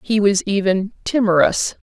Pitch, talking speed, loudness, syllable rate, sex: 200 Hz, 130 wpm, -17 LUFS, 4.4 syllables/s, female